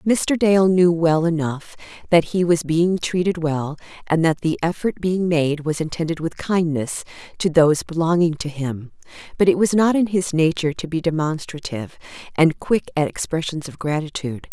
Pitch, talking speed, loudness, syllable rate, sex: 165 Hz, 175 wpm, -20 LUFS, 5.0 syllables/s, female